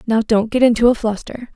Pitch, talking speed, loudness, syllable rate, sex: 230 Hz, 230 wpm, -16 LUFS, 5.7 syllables/s, female